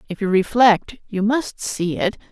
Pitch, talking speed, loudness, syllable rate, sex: 210 Hz, 180 wpm, -19 LUFS, 4.2 syllables/s, female